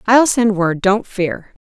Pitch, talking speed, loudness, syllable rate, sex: 205 Hz, 180 wpm, -16 LUFS, 3.5 syllables/s, female